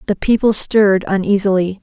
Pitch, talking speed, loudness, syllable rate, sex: 200 Hz, 130 wpm, -15 LUFS, 5.6 syllables/s, female